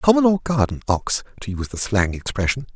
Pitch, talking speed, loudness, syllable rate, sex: 125 Hz, 220 wpm, -21 LUFS, 6.3 syllables/s, male